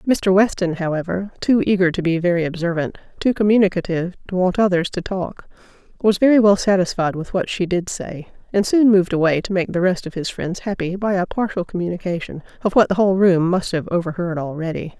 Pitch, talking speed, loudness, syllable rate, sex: 185 Hz, 200 wpm, -19 LUFS, 5.9 syllables/s, female